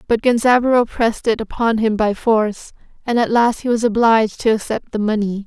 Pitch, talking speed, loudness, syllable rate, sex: 225 Hz, 200 wpm, -17 LUFS, 5.6 syllables/s, female